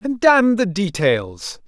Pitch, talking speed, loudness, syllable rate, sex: 195 Hz, 145 wpm, -17 LUFS, 3.3 syllables/s, male